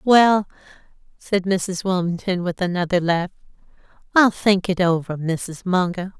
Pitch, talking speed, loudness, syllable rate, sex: 185 Hz, 125 wpm, -20 LUFS, 4.2 syllables/s, female